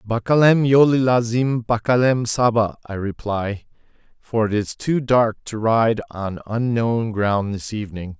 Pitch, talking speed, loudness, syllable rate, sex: 115 Hz, 140 wpm, -20 LUFS, 4.0 syllables/s, male